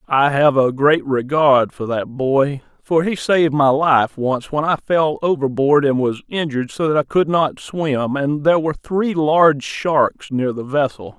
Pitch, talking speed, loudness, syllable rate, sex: 145 Hz, 195 wpm, -17 LUFS, 4.3 syllables/s, male